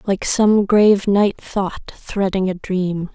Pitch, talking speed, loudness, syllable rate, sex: 195 Hz, 155 wpm, -17 LUFS, 3.5 syllables/s, female